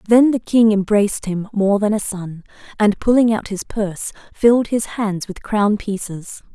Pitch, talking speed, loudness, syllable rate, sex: 210 Hz, 185 wpm, -18 LUFS, 4.6 syllables/s, female